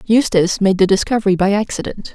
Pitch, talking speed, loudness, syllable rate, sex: 200 Hz, 170 wpm, -15 LUFS, 6.4 syllables/s, female